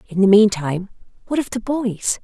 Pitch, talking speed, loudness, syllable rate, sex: 210 Hz, 190 wpm, -18 LUFS, 5.4 syllables/s, female